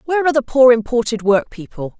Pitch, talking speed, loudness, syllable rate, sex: 245 Hz, 210 wpm, -15 LUFS, 6.5 syllables/s, female